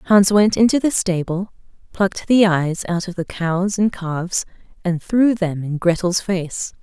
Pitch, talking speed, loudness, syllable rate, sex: 185 Hz, 175 wpm, -19 LUFS, 4.2 syllables/s, female